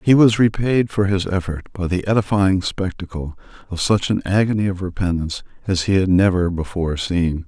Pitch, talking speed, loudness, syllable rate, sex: 95 Hz, 175 wpm, -19 LUFS, 5.4 syllables/s, male